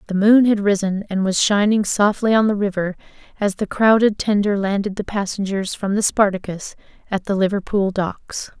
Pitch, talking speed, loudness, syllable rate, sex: 200 Hz, 175 wpm, -19 LUFS, 5.1 syllables/s, female